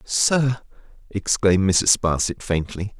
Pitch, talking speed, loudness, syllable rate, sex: 105 Hz, 100 wpm, -20 LUFS, 3.7 syllables/s, male